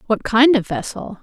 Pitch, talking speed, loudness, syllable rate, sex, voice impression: 235 Hz, 195 wpm, -16 LUFS, 4.7 syllables/s, female, feminine, adult-like, slightly powerful, hard, clear, intellectual, calm, lively, intense, sharp